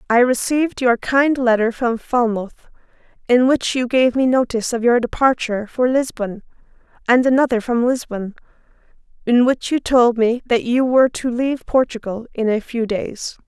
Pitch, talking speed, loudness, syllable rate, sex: 240 Hz, 165 wpm, -18 LUFS, 4.9 syllables/s, female